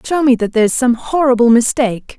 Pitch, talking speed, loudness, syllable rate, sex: 245 Hz, 190 wpm, -13 LUFS, 5.7 syllables/s, female